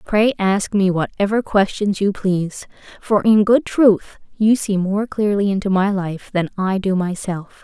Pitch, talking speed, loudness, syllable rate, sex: 200 Hz, 175 wpm, -18 LUFS, 4.3 syllables/s, female